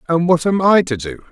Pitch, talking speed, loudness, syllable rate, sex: 165 Hz, 275 wpm, -15 LUFS, 5.6 syllables/s, male